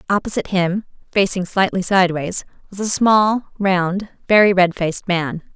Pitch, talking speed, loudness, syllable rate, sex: 190 Hz, 140 wpm, -18 LUFS, 4.8 syllables/s, female